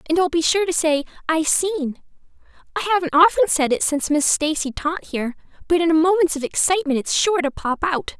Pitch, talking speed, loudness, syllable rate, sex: 325 Hz, 205 wpm, -19 LUFS, 5.6 syllables/s, female